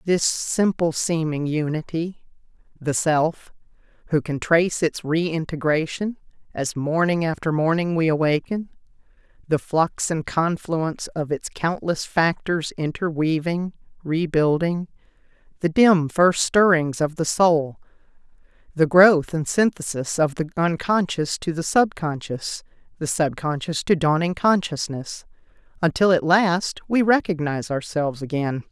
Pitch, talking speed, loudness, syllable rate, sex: 165 Hz, 115 wpm, -22 LUFS, 4.2 syllables/s, female